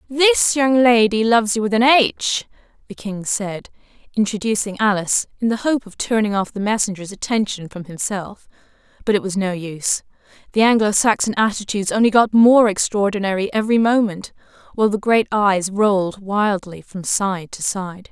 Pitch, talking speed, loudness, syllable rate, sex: 210 Hz, 155 wpm, -18 LUFS, 5.1 syllables/s, female